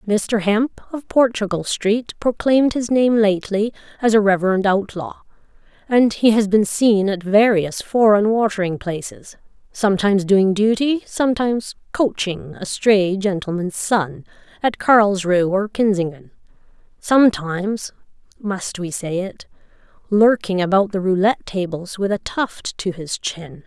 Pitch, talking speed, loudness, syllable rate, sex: 205 Hz, 125 wpm, -18 LUFS, 4.4 syllables/s, female